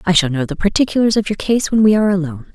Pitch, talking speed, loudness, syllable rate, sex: 190 Hz, 285 wpm, -15 LUFS, 7.4 syllables/s, female